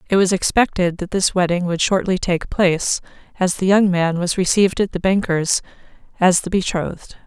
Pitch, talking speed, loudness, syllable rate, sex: 185 Hz, 180 wpm, -18 LUFS, 5.3 syllables/s, female